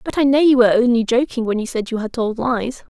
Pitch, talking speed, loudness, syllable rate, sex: 240 Hz, 285 wpm, -17 LUFS, 6.2 syllables/s, female